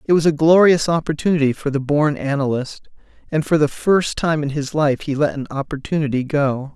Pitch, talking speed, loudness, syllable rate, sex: 150 Hz, 195 wpm, -18 LUFS, 5.4 syllables/s, male